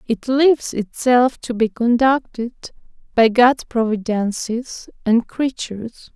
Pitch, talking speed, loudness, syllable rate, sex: 240 Hz, 105 wpm, -18 LUFS, 3.8 syllables/s, female